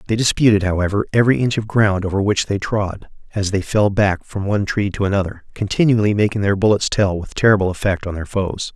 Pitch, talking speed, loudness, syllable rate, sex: 100 Hz, 210 wpm, -18 LUFS, 6.0 syllables/s, male